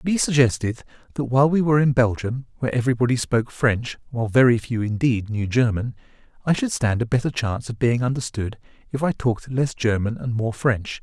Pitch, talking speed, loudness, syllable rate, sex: 125 Hz, 190 wpm, -22 LUFS, 5.9 syllables/s, male